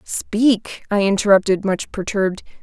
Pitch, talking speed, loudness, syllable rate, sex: 200 Hz, 115 wpm, -18 LUFS, 4.4 syllables/s, female